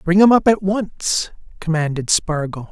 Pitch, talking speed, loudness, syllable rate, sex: 175 Hz, 155 wpm, -17 LUFS, 4.2 syllables/s, male